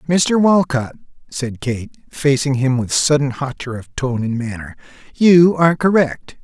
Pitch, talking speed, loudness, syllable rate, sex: 140 Hz, 150 wpm, -17 LUFS, 4.4 syllables/s, male